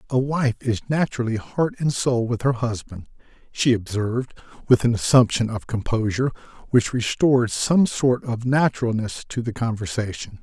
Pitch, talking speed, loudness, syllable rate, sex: 120 Hz, 150 wpm, -22 LUFS, 5.1 syllables/s, male